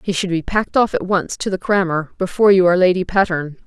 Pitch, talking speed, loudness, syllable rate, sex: 185 Hz, 245 wpm, -17 LUFS, 6.7 syllables/s, female